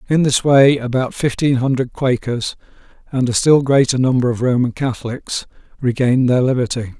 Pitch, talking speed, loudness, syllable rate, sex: 130 Hz, 155 wpm, -16 LUFS, 5.4 syllables/s, male